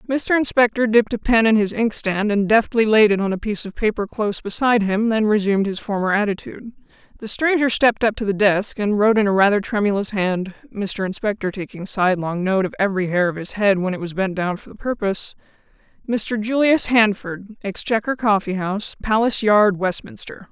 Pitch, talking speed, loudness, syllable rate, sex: 210 Hz, 190 wpm, -19 LUFS, 5.8 syllables/s, female